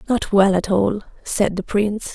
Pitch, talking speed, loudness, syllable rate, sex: 200 Hz, 195 wpm, -19 LUFS, 4.5 syllables/s, female